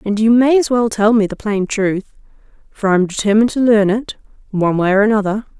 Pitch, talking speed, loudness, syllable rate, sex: 215 Hz, 225 wpm, -15 LUFS, 6.1 syllables/s, female